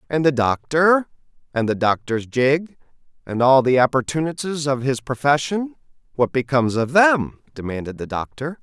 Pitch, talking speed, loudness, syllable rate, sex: 140 Hz, 140 wpm, -20 LUFS, 4.9 syllables/s, male